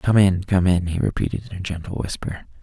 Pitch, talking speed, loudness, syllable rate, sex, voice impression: 90 Hz, 230 wpm, -22 LUFS, 5.9 syllables/s, male, masculine, adult-like, slightly dark, sincere, slightly calm, slightly unique